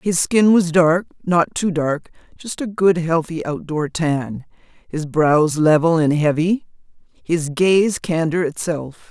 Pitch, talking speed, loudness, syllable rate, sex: 165 Hz, 140 wpm, -18 LUFS, 3.6 syllables/s, female